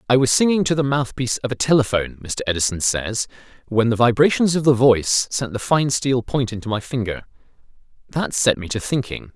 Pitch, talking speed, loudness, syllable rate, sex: 125 Hz, 200 wpm, -19 LUFS, 5.7 syllables/s, male